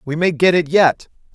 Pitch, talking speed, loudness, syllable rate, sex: 165 Hz, 220 wpm, -15 LUFS, 4.9 syllables/s, male